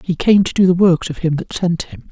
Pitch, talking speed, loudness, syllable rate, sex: 180 Hz, 310 wpm, -15 LUFS, 5.5 syllables/s, male